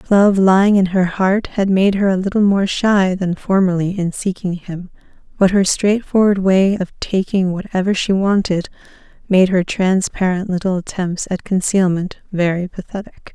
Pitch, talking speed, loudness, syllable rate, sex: 190 Hz, 155 wpm, -16 LUFS, 4.6 syllables/s, female